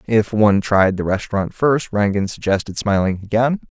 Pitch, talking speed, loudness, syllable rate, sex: 105 Hz, 160 wpm, -18 LUFS, 5.2 syllables/s, male